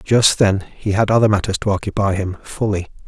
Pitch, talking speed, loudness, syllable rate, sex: 100 Hz, 175 wpm, -18 LUFS, 5.5 syllables/s, male